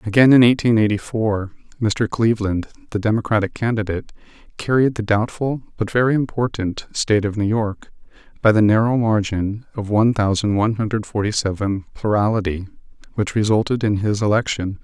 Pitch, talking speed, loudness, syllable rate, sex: 110 Hz, 150 wpm, -19 LUFS, 5.6 syllables/s, male